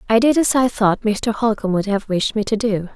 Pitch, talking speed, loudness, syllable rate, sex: 215 Hz, 265 wpm, -18 LUFS, 5.5 syllables/s, female